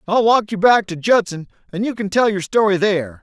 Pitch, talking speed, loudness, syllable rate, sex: 200 Hz, 240 wpm, -17 LUFS, 5.7 syllables/s, male